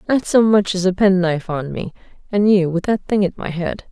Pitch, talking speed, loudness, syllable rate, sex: 190 Hz, 245 wpm, -18 LUFS, 5.3 syllables/s, female